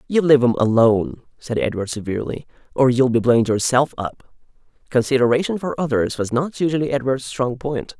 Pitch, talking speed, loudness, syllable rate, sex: 130 Hz, 165 wpm, -19 LUFS, 3.7 syllables/s, male